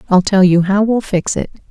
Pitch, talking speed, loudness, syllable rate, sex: 195 Hz, 245 wpm, -14 LUFS, 5.2 syllables/s, female